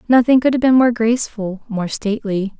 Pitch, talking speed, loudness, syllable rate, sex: 225 Hz, 185 wpm, -16 LUFS, 5.6 syllables/s, female